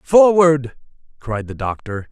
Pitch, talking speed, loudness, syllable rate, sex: 140 Hz, 115 wpm, -17 LUFS, 3.6 syllables/s, male